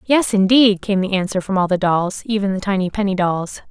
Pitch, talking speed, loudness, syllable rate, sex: 195 Hz, 225 wpm, -17 LUFS, 5.4 syllables/s, female